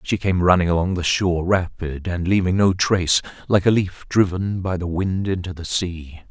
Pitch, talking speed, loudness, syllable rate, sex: 90 Hz, 200 wpm, -20 LUFS, 5.0 syllables/s, male